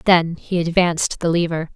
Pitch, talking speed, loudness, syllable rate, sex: 170 Hz, 170 wpm, -19 LUFS, 5.0 syllables/s, female